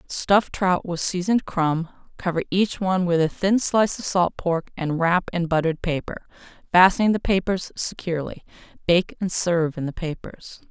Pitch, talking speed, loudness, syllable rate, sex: 175 Hz, 170 wpm, -22 LUFS, 5.1 syllables/s, female